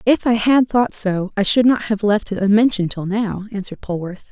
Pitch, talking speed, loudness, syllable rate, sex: 210 Hz, 220 wpm, -18 LUFS, 5.4 syllables/s, female